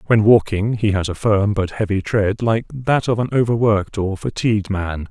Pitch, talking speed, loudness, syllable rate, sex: 105 Hz, 200 wpm, -18 LUFS, 4.9 syllables/s, male